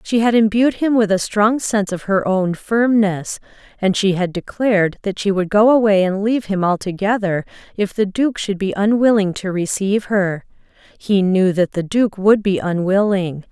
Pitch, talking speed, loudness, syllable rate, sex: 200 Hz, 185 wpm, -17 LUFS, 4.8 syllables/s, female